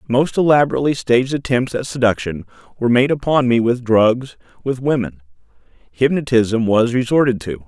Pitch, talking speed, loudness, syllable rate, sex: 120 Hz, 140 wpm, -17 LUFS, 5.5 syllables/s, male